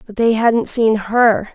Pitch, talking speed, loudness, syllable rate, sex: 225 Hz, 195 wpm, -15 LUFS, 3.7 syllables/s, female